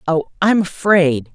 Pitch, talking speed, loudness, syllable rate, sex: 170 Hz, 180 wpm, -16 LUFS, 4.6 syllables/s, female